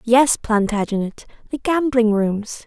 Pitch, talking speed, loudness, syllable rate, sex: 230 Hz, 110 wpm, -19 LUFS, 3.9 syllables/s, female